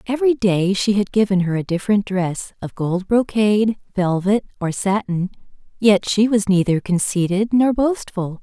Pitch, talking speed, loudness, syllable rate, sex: 200 Hz, 155 wpm, -19 LUFS, 4.7 syllables/s, female